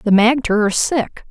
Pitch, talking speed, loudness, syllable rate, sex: 230 Hz, 185 wpm, -16 LUFS, 5.0 syllables/s, female